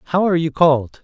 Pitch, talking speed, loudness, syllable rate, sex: 155 Hz, 230 wpm, -16 LUFS, 6.1 syllables/s, male